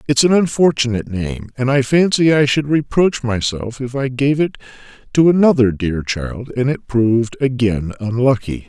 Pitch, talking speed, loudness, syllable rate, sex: 130 Hz, 165 wpm, -16 LUFS, 4.8 syllables/s, male